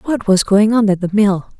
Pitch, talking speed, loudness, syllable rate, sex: 205 Hz, 265 wpm, -14 LUFS, 5.3 syllables/s, female